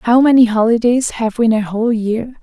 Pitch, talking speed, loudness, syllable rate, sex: 230 Hz, 225 wpm, -14 LUFS, 5.6 syllables/s, female